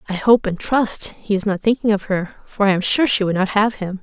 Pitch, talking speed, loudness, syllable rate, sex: 205 Hz, 285 wpm, -18 LUFS, 5.4 syllables/s, female